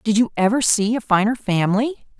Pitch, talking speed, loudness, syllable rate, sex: 220 Hz, 190 wpm, -19 LUFS, 6.0 syllables/s, female